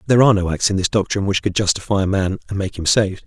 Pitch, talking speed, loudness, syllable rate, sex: 100 Hz, 295 wpm, -18 LUFS, 7.6 syllables/s, male